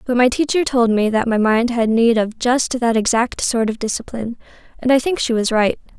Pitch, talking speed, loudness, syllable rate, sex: 235 Hz, 230 wpm, -17 LUFS, 5.3 syllables/s, female